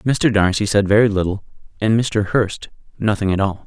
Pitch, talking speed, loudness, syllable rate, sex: 105 Hz, 180 wpm, -18 LUFS, 5.0 syllables/s, male